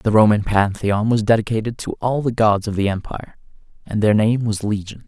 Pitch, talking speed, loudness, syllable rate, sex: 110 Hz, 200 wpm, -19 LUFS, 5.5 syllables/s, male